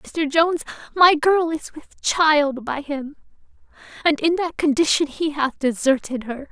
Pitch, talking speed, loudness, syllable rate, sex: 300 Hz, 155 wpm, -20 LUFS, 4.2 syllables/s, female